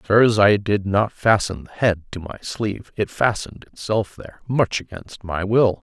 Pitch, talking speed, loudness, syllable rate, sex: 105 Hz, 175 wpm, -20 LUFS, 4.7 syllables/s, male